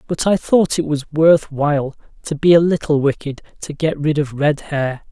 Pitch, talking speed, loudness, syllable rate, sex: 150 Hz, 210 wpm, -17 LUFS, 4.7 syllables/s, male